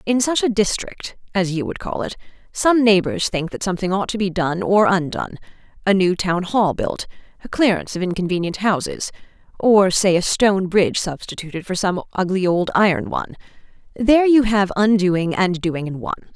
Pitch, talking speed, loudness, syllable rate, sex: 190 Hz, 180 wpm, -19 LUFS, 5.5 syllables/s, female